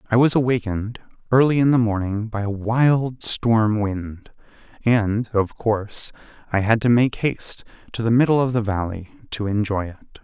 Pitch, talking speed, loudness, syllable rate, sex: 110 Hz, 170 wpm, -21 LUFS, 4.7 syllables/s, male